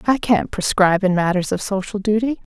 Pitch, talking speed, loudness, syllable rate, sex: 200 Hz, 190 wpm, -19 LUFS, 5.6 syllables/s, female